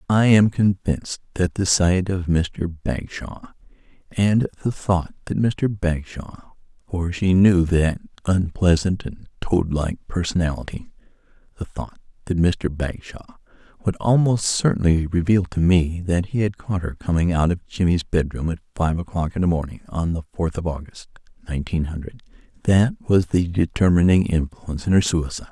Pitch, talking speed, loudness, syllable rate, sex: 90 Hz, 150 wpm, -21 LUFS, 5.0 syllables/s, male